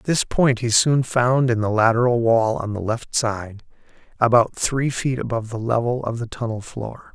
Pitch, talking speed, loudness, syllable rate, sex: 120 Hz, 195 wpm, -20 LUFS, 4.6 syllables/s, male